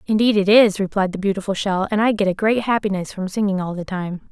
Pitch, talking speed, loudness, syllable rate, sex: 200 Hz, 250 wpm, -19 LUFS, 6.1 syllables/s, female